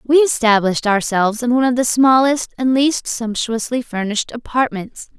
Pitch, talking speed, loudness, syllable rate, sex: 240 Hz, 150 wpm, -16 LUFS, 5.2 syllables/s, female